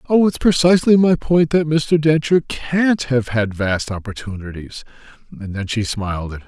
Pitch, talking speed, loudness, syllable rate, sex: 135 Hz, 175 wpm, -17 LUFS, 4.9 syllables/s, male